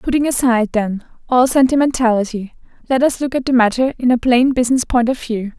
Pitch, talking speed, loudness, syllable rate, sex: 245 Hz, 195 wpm, -16 LUFS, 5.9 syllables/s, female